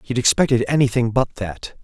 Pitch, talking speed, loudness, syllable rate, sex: 120 Hz, 195 wpm, -19 LUFS, 5.9 syllables/s, male